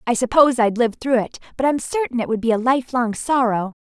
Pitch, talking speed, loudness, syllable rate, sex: 245 Hz, 235 wpm, -19 LUFS, 6.1 syllables/s, female